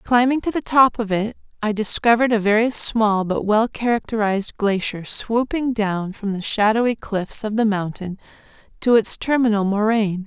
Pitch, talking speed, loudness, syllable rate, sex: 215 Hz, 165 wpm, -19 LUFS, 4.9 syllables/s, female